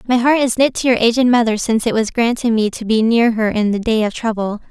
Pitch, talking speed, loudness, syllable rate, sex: 230 Hz, 280 wpm, -16 LUFS, 6.1 syllables/s, female